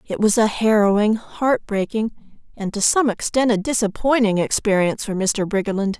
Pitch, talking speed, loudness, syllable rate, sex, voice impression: 210 Hz, 160 wpm, -19 LUFS, 5.2 syllables/s, female, feminine, adult-like, fluent, slightly unique, slightly intense